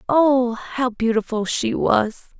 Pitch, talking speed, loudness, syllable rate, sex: 240 Hz, 125 wpm, -20 LUFS, 3.3 syllables/s, female